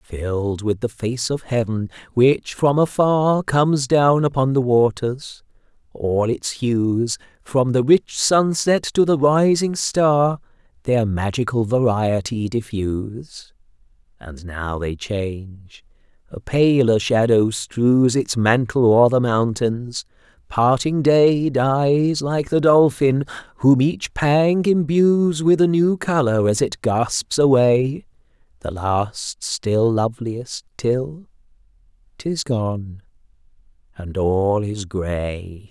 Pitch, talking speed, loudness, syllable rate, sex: 125 Hz, 115 wpm, -19 LUFS, 3.3 syllables/s, male